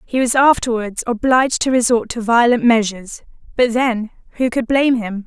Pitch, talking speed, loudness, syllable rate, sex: 235 Hz, 170 wpm, -16 LUFS, 5.3 syllables/s, female